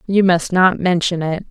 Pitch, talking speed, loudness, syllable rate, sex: 180 Hz, 200 wpm, -16 LUFS, 4.6 syllables/s, female